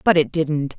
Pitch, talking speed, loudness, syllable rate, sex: 155 Hz, 230 wpm, -20 LUFS, 4.4 syllables/s, female